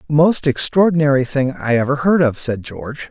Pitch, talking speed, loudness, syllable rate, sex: 145 Hz, 175 wpm, -16 LUFS, 5.2 syllables/s, male